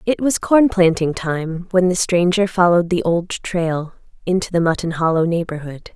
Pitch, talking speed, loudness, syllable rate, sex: 175 Hz, 170 wpm, -18 LUFS, 4.8 syllables/s, female